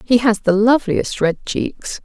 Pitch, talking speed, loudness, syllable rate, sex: 210 Hz, 175 wpm, -17 LUFS, 4.3 syllables/s, female